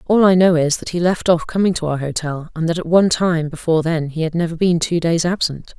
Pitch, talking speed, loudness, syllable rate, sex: 165 Hz, 270 wpm, -17 LUFS, 5.9 syllables/s, female